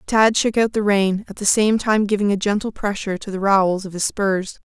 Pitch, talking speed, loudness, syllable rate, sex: 205 Hz, 245 wpm, -19 LUFS, 5.4 syllables/s, female